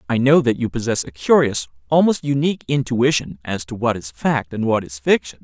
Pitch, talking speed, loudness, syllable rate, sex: 130 Hz, 210 wpm, -19 LUFS, 5.5 syllables/s, male